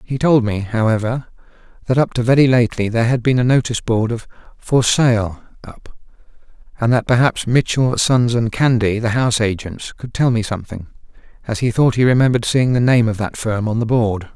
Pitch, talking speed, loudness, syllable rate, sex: 115 Hz, 195 wpm, -16 LUFS, 5.5 syllables/s, male